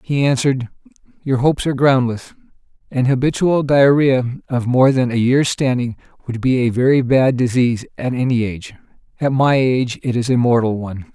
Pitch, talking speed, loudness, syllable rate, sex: 125 Hz, 170 wpm, -16 LUFS, 5.5 syllables/s, male